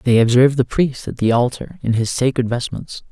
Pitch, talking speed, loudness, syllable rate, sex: 125 Hz, 210 wpm, -17 LUFS, 5.4 syllables/s, male